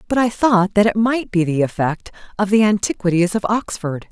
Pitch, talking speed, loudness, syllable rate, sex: 200 Hz, 205 wpm, -18 LUFS, 5.2 syllables/s, female